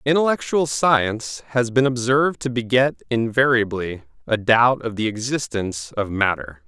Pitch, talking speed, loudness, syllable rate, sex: 120 Hz, 135 wpm, -20 LUFS, 4.7 syllables/s, male